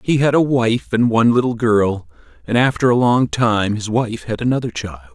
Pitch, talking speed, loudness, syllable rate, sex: 115 Hz, 210 wpm, -17 LUFS, 5.0 syllables/s, male